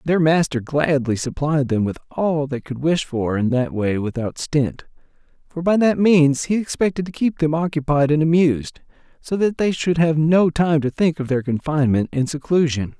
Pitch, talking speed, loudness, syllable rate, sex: 150 Hz, 195 wpm, -19 LUFS, 4.8 syllables/s, male